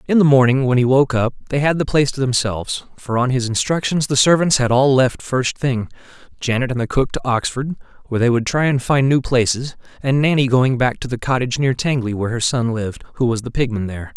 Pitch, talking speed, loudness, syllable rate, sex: 130 Hz, 235 wpm, -18 LUFS, 6.0 syllables/s, male